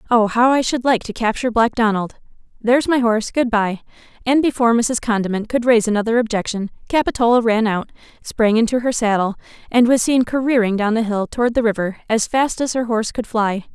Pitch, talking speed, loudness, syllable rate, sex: 230 Hz, 195 wpm, -18 LUFS, 6.1 syllables/s, female